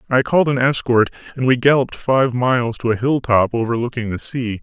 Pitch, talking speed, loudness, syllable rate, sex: 125 Hz, 195 wpm, -17 LUFS, 5.8 syllables/s, male